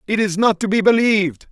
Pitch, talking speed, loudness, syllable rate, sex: 205 Hz, 240 wpm, -16 LUFS, 5.9 syllables/s, male